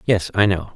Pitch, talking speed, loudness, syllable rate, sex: 95 Hz, 240 wpm, -19 LUFS, 5.0 syllables/s, male